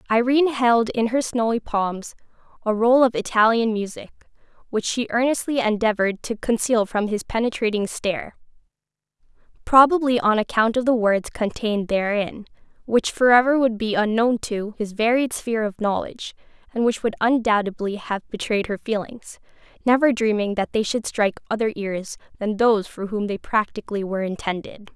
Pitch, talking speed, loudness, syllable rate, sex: 225 Hz, 155 wpm, -21 LUFS, 5.3 syllables/s, female